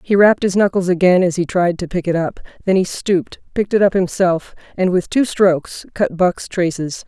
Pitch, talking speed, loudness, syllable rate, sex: 185 Hz, 220 wpm, -17 LUFS, 5.4 syllables/s, female